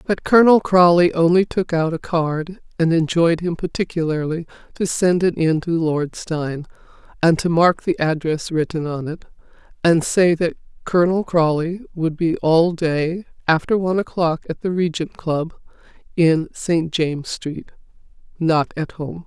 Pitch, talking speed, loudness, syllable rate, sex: 165 Hz, 155 wpm, -19 LUFS, 4.5 syllables/s, female